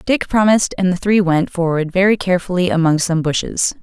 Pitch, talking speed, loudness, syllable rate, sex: 180 Hz, 190 wpm, -16 LUFS, 5.7 syllables/s, female